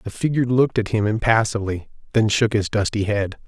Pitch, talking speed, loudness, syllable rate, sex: 110 Hz, 190 wpm, -20 LUFS, 6.2 syllables/s, male